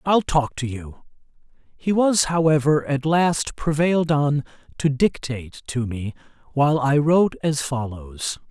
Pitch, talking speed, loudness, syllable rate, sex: 140 Hz, 140 wpm, -21 LUFS, 4.3 syllables/s, male